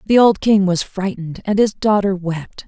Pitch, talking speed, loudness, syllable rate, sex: 195 Hz, 200 wpm, -17 LUFS, 4.9 syllables/s, female